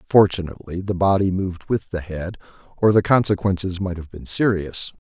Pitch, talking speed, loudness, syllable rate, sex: 95 Hz, 165 wpm, -21 LUFS, 5.4 syllables/s, male